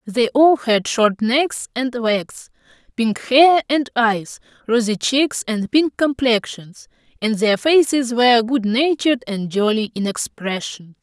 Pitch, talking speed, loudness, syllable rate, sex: 240 Hz, 135 wpm, -18 LUFS, 3.8 syllables/s, female